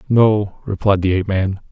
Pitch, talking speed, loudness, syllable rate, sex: 100 Hz, 175 wpm, -17 LUFS, 5.0 syllables/s, male